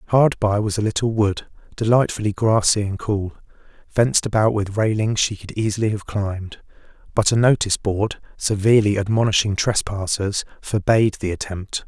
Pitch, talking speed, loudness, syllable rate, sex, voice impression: 105 Hz, 145 wpm, -20 LUFS, 5.2 syllables/s, male, very masculine, very adult-like, cool, sincere, calm